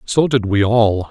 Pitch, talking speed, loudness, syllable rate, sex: 110 Hz, 215 wpm, -15 LUFS, 4.0 syllables/s, male